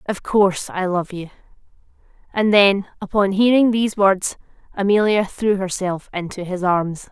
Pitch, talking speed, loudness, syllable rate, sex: 195 Hz, 145 wpm, -19 LUFS, 4.6 syllables/s, female